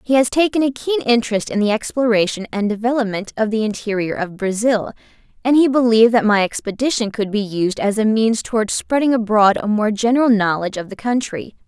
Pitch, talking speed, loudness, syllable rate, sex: 225 Hz, 195 wpm, -17 LUFS, 5.8 syllables/s, female